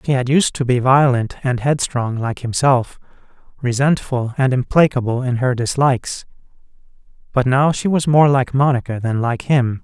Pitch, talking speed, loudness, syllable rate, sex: 130 Hz, 160 wpm, -17 LUFS, 4.8 syllables/s, male